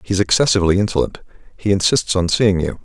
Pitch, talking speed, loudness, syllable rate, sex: 95 Hz, 150 wpm, -17 LUFS, 6.3 syllables/s, male